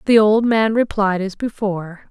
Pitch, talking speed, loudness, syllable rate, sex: 210 Hz, 170 wpm, -18 LUFS, 4.7 syllables/s, female